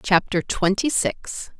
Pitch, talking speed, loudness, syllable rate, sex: 200 Hz, 115 wpm, -22 LUFS, 3.5 syllables/s, female